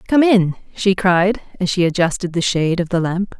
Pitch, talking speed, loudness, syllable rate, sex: 185 Hz, 210 wpm, -17 LUFS, 5.2 syllables/s, female